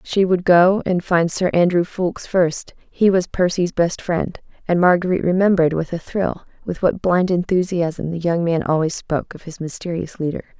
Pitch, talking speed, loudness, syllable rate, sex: 175 Hz, 185 wpm, -19 LUFS, 5.0 syllables/s, female